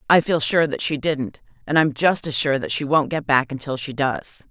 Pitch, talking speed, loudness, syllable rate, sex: 145 Hz, 265 wpm, -21 LUFS, 5.3 syllables/s, female